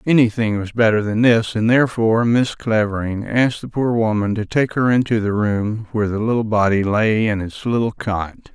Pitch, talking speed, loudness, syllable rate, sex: 110 Hz, 195 wpm, -18 LUFS, 5.3 syllables/s, male